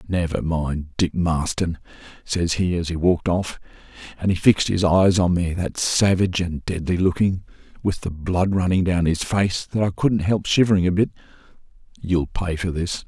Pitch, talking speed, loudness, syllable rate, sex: 90 Hz, 185 wpm, -21 LUFS, 4.9 syllables/s, male